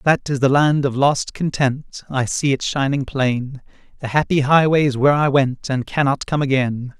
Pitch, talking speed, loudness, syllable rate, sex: 135 Hz, 190 wpm, -18 LUFS, 4.5 syllables/s, male